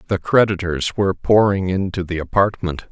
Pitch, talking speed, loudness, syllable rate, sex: 95 Hz, 145 wpm, -18 LUFS, 5.2 syllables/s, male